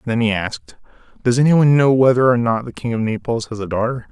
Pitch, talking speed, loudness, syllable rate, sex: 115 Hz, 250 wpm, -17 LUFS, 6.5 syllables/s, male